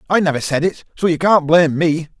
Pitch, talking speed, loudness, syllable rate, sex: 165 Hz, 220 wpm, -16 LUFS, 6.1 syllables/s, male